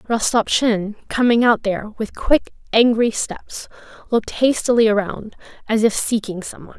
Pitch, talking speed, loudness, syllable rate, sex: 225 Hz, 135 wpm, -18 LUFS, 4.9 syllables/s, female